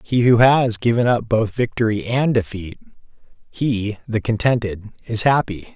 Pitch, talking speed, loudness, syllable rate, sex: 115 Hz, 145 wpm, -19 LUFS, 4.5 syllables/s, male